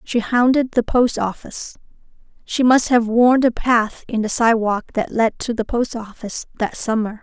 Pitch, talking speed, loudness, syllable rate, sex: 230 Hz, 185 wpm, -18 LUFS, 4.8 syllables/s, female